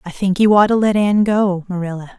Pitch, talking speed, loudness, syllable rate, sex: 195 Hz, 245 wpm, -15 LUFS, 6.0 syllables/s, female